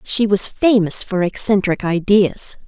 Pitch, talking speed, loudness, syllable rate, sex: 200 Hz, 135 wpm, -16 LUFS, 4.0 syllables/s, female